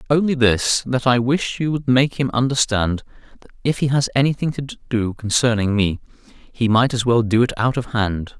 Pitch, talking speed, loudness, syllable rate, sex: 120 Hz, 200 wpm, -19 LUFS, 4.9 syllables/s, male